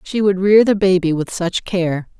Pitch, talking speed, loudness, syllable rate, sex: 185 Hz, 220 wpm, -16 LUFS, 4.5 syllables/s, female